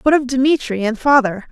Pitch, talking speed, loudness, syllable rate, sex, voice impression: 250 Hz, 200 wpm, -16 LUFS, 5.1 syllables/s, female, very feminine, slightly young, slightly adult-like, thin, tensed, powerful, very bright, very hard, very clear, very fluent, slightly cute, slightly cool, intellectual, very refreshing, sincere, slightly calm, friendly, reassuring, unique, elegant, slightly wild, sweet, very lively, strict, intense, slightly sharp